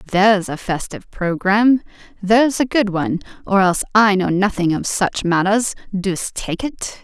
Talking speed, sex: 160 wpm, female